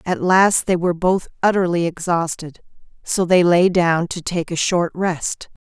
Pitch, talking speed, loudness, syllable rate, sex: 175 Hz, 170 wpm, -18 LUFS, 4.3 syllables/s, female